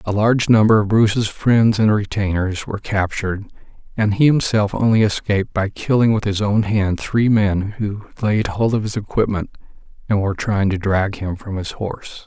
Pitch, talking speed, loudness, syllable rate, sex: 105 Hz, 185 wpm, -18 LUFS, 5.0 syllables/s, male